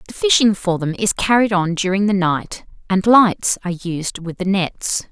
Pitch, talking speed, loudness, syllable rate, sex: 190 Hz, 200 wpm, -17 LUFS, 4.5 syllables/s, female